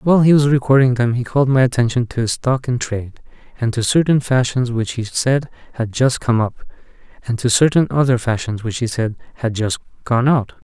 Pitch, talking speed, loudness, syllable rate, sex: 125 Hz, 205 wpm, -17 LUFS, 5.7 syllables/s, male